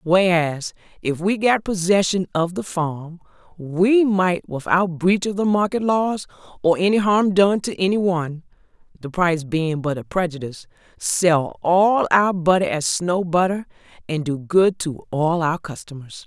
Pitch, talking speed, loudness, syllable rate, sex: 175 Hz, 160 wpm, -20 LUFS, 3.9 syllables/s, female